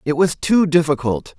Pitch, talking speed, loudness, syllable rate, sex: 160 Hz, 175 wpm, -17 LUFS, 4.8 syllables/s, male